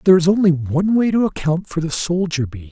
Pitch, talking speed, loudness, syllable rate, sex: 170 Hz, 245 wpm, -18 LUFS, 6.2 syllables/s, male